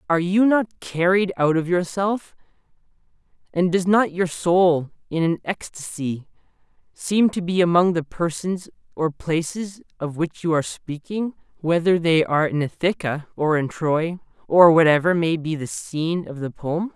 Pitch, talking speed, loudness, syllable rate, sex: 170 Hz, 160 wpm, -21 LUFS, 4.5 syllables/s, male